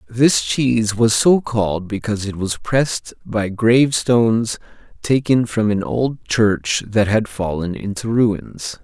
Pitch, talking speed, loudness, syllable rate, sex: 110 Hz, 145 wpm, -18 LUFS, 4.0 syllables/s, male